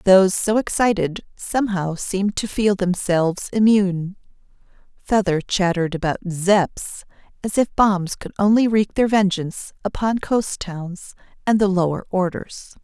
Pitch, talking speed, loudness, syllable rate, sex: 195 Hz, 130 wpm, -20 LUFS, 4.6 syllables/s, female